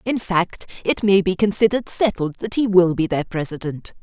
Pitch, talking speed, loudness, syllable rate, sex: 190 Hz, 195 wpm, -20 LUFS, 5.2 syllables/s, female